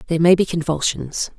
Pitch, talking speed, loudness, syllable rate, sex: 165 Hz, 175 wpm, -19 LUFS, 6.1 syllables/s, female